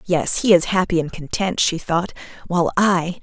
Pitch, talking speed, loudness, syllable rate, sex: 175 Hz, 185 wpm, -19 LUFS, 4.7 syllables/s, female